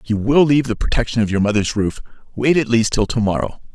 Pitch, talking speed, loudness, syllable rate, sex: 115 Hz, 240 wpm, -18 LUFS, 6.5 syllables/s, male